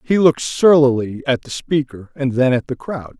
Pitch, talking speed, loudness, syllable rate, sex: 135 Hz, 205 wpm, -17 LUFS, 5.1 syllables/s, male